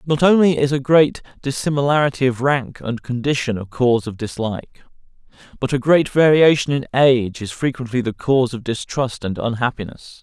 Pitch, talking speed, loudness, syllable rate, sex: 130 Hz, 165 wpm, -18 LUFS, 5.4 syllables/s, male